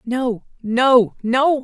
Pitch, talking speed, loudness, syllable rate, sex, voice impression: 245 Hz, 110 wpm, -17 LUFS, 2.2 syllables/s, female, very feminine, very adult-like, very thin, tensed, slightly powerful, bright, soft, slightly clear, fluent, slightly raspy, cute, very intellectual, refreshing, sincere, calm, very friendly, very reassuring, unique, very elegant, slightly wild, sweet, lively, kind, slightly modest, light